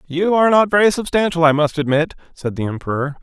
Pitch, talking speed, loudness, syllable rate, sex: 165 Hz, 205 wpm, -17 LUFS, 6.4 syllables/s, male